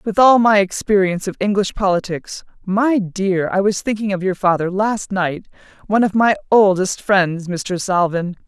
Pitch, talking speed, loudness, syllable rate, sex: 195 Hz, 155 wpm, -17 LUFS, 4.6 syllables/s, female